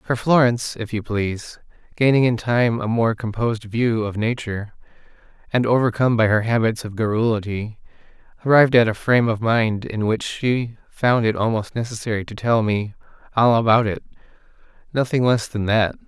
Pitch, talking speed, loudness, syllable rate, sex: 115 Hz, 160 wpm, -20 LUFS, 5.3 syllables/s, male